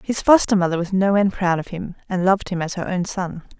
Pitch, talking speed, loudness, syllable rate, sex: 185 Hz, 265 wpm, -20 LUFS, 5.9 syllables/s, female